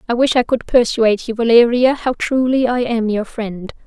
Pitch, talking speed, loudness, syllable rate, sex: 235 Hz, 200 wpm, -16 LUFS, 5.0 syllables/s, female